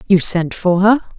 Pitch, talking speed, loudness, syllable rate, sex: 195 Hz, 200 wpm, -14 LUFS, 4.7 syllables/s, female